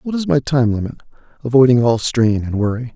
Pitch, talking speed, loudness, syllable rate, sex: 125 Hz, 205 wpm, -16 LUFS, 5.8 syllables/s, male